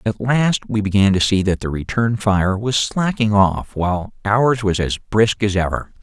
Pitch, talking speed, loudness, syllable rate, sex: 105 Hz, 200 wpm, -18 LUFS, 4.4 syllables/s, male